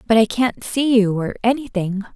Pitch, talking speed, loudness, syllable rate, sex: 220 Hz, 140 wpm, -19 LUFS, 4.8 syllables/s, female